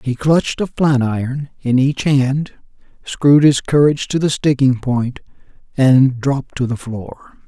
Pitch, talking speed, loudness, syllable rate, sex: 135 Hz, 160 wpm, -16 LUFS, 4.3 syllables/s, male